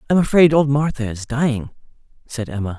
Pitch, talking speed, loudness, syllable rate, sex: 130 Hz, 170 wpm, -18 LUFS, 5.9 syllables/s, male